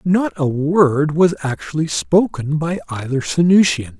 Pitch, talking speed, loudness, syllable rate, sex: 160 Hz, 135 wpm, -17 LUFS, 4.0 syllables/s, male